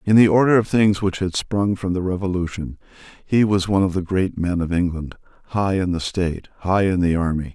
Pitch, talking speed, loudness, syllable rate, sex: 95 Hz, 225 wpm, -20 LUFS, 5.6 syllables/s, male